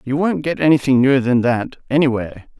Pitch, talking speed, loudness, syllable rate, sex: 135 Hz, 185 wpm, -17 LUFS, 6.4 syllables/s, male